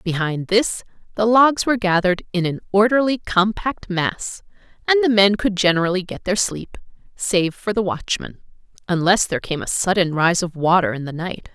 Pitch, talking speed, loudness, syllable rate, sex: 190 Hz, 175 wpm, -19 LUFS, 5.0 syllables/s, female